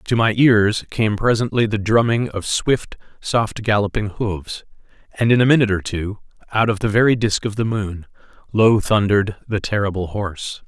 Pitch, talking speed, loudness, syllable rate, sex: 105 Hz, 175 wpm, -19 LUFS, 4.9 syllables/s, male